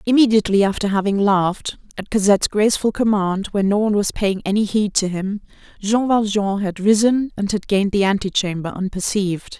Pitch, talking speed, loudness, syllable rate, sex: 205 Hz, 170 wpm, -19 LUFS, 5.7 syllables/s, female